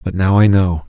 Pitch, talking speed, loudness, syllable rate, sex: 95 Hz, 275 wpm, -13 LUFS, 5.3 syllables/s, male